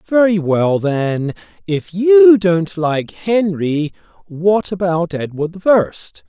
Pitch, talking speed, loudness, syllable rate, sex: 180 Hz, 125 wpm, -15 LUFS, 3.1 syllables/s, male